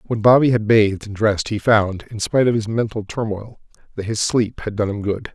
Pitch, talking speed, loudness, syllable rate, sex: 110 Hz, 235 wpm, -19 LUFS, 5.6 syllables/s, male